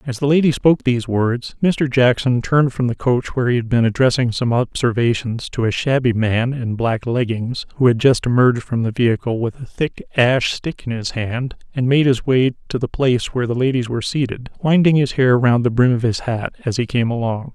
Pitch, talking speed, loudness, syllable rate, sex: 125 Hz, 225 wpm, -18 LUFS, 5.5 syllables/s, male